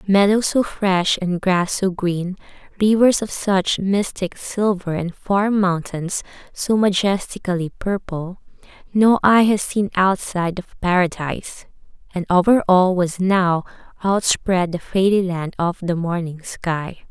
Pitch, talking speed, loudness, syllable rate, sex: 185 Hz, 135 wpm, -19 LUFS, 3.9 syllables/s, female